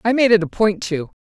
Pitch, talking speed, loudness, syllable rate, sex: 205 Hz, 290 wpm, -17 LUFS, 5.7 syllables/s, female